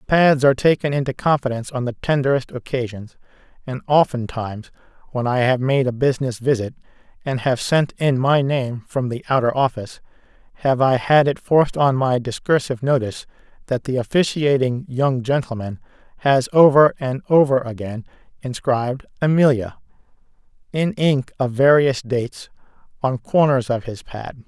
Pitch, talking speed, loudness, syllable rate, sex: 130 Hz, 145 wpm, -19 LUFS, 5.2 syllables/s, male